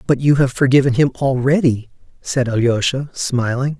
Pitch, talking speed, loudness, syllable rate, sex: 130 Hz, 140 wpm, -17 LUFS, 4.9 syllables/s, male